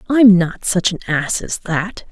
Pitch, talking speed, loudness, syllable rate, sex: 190 Hz, 200 wpm, -16 LUFS, 3.9 syllables/s, female